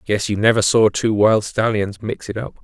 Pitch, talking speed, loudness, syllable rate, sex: 105 Hz, 230 wpm, -18 LUFS, 4.8 syllables/s, male